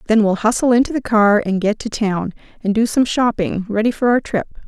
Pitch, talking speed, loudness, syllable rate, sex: 220 Hz, 230 wpm, -17 LUFS, 5.5 syllables/s, female